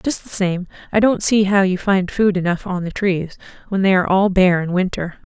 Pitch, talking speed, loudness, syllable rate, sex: 190 Hz, 235 wpm, -18 LUFS, 5.2 syllables/s, female